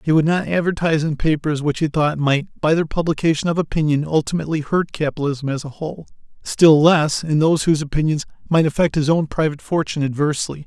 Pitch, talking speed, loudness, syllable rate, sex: 155 Hz, 190 wpm, -19 LUFS, 6.3 syllables/s, male